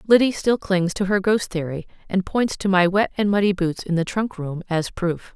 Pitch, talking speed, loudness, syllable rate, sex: 190 Hz, 235 wpm, -21 LUFS, 5.0 syllables/s, female